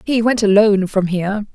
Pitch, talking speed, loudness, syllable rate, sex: 205 Hz, 195 wpm, -15 LUFS, 5.8 syllables/s, female